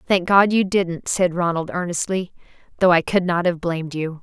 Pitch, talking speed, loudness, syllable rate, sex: 175 Hz, 200 wpm, -20 LUFS, 5.1 syllables/s, female